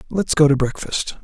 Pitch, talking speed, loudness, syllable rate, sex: 150 Hz, 195 wpm, -18 LUFS, 5.0 syllables/s, male